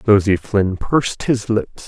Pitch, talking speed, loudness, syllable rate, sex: 105 Hz, 160 wpm, -18 LUFS, 4.0 syllables/s, male